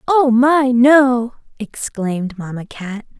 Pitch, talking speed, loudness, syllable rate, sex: 240 Hz, 115 wpm, -14 LUFS, 3.4 syllables/s, female